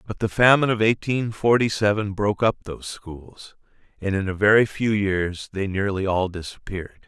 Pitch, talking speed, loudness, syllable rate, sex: 100 Hz, 180 wpm, -22 LUFS, 5.2 syllables/s, male